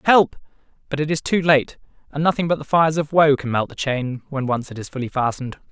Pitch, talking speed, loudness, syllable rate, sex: 145 Hz, 240 wpm, -20 LUFS, 6.1 syllables/s, male